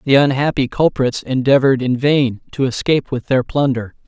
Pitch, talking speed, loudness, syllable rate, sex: 135 Hz, 160 wpm, -16 LUFS, 5.3 syllables/s, male